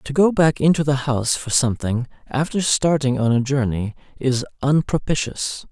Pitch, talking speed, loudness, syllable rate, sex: 135 Hz, 155 wpm, -20 LUFS, 4.9 syllables/s, male